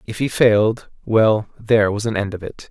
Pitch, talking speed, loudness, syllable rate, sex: 110 Hz, 200 wpm, -18 LUFS, 5.0 syllables/s, male